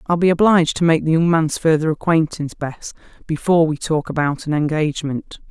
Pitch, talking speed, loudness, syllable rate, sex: 160 Hz, 185 wpm, -18 LUFS, 5.8 syllables/s, female